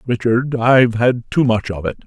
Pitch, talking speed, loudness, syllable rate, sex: 115 Hz, 205 wpm, -16 LUFS, 4.8 syllables/s, male